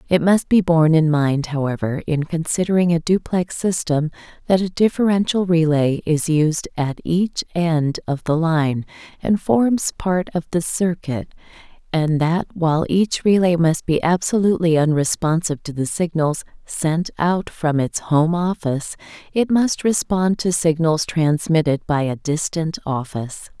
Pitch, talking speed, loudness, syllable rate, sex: 165 Hz, 145 wpm, -19 LUFS, 4.4 syllables/s, female